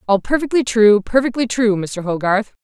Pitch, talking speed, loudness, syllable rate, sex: 220 Hz, 160 wpm, -16 LUFS, 5.0 syllables/s, female